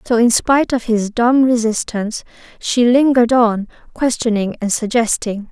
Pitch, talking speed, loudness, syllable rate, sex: 230 Hz, 140 wpm, -15 LUFS, 4.8 syllables/s, female